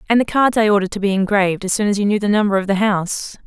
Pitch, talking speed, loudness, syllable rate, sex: 205 Hz, 310 wpm, -17 LUFS, 7.5 syllables/s, female